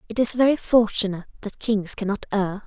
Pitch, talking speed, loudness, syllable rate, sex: 210 Hz, 180 wpm, -21 LUFS, 5.9 syllables/s, female